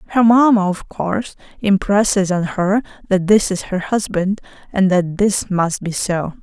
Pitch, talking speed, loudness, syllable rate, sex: 195 Hz, 170 wpm, -17 LUFS, 4.4 syllables/s, female